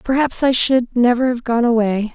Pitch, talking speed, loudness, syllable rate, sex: 240 Hz, 195 wpm, -16 LUFS, 5.0 syllables/s, female